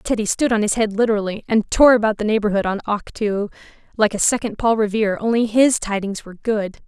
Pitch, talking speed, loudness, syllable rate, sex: 215 Hz, 190 wpm, -19 LUFS, 5.9 syllables/s, female